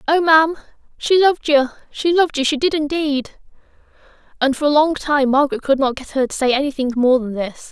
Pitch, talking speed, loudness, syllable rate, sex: 290 Hz, 210 wpm, -17 LUFS, 5.8 syllables/s, female